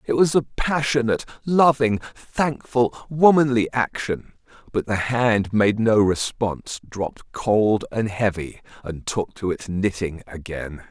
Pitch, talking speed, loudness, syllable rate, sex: 110 Hz, 125 wpm, -22 LUFS, 4.0 syllables/s, male